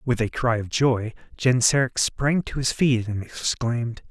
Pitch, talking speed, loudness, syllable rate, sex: 125 Hz, 175 wpm, -23 LUFS, 4.3 syllables/s, male